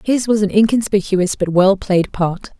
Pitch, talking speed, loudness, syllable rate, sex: 200 Hz, 185 wpm, -16 LUFS, 4.5 syllables/s, female